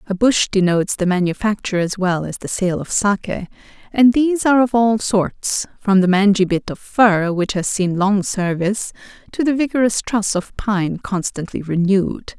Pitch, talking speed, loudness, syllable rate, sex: 200 Hz, 180 wpm, -18 LUFS, 4.8 syllables/s, female